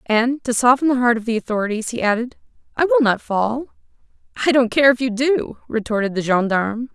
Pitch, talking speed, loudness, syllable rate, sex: 235 Hz, 200 wpm, -19 LUFS, 5.8 syllables/s, female